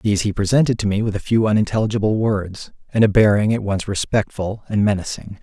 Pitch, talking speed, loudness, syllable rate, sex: 105 Hz, 200 wpm, -19 LUFS, 6.0 syllables/s, male